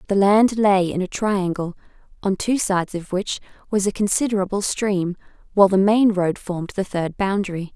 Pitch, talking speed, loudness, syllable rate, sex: 195 Hz, 180 wpm, -21 LUFS, 5.1 syllables/s, female